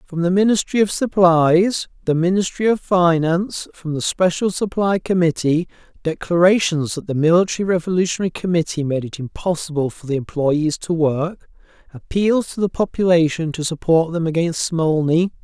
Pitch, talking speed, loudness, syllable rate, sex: 170 Hz, 145 wpm, -18 LUFS, 5.1 syllables/s, male